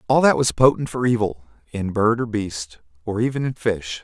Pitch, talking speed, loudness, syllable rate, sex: 110 Hz, 210 wpm, -21 LUFS, 5.1 syllables/s, male